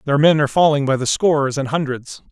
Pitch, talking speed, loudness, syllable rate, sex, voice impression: 145 Hz, 235 wpm, -17 LUFS, 6.2 syllables/s, male, very masculine, middle-aged, very thick, tensed, powerful, bright, soft, slightly clear, fluent, cool, intellectual, refreshing, sincere, calm, mature, friendly, very reassuring, unique, elegant, wild, slightly sweet, lively, strict, slightly intense